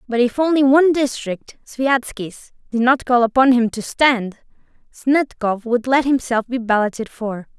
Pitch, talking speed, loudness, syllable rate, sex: 245 Hz, 160 wpm, -18 LUFS, 4.4 syllables/s, female